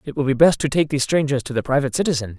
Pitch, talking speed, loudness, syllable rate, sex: 140 Hz, 300 wpm, -19 LUFS, 7.9 syllables/s, male